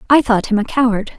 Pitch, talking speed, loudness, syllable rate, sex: 230 Hz, 255 wpm, -15 LUFS, 6.3 syllables/s, female